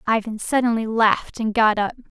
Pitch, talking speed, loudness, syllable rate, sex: 220 Hz, 165 wpm, -20 LUFS, 5.5 syllables/s, female